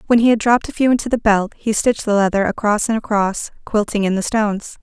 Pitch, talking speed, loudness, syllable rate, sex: 215 Hz, 250 wpm, -17 LUFS, 6.3 syllables/s, female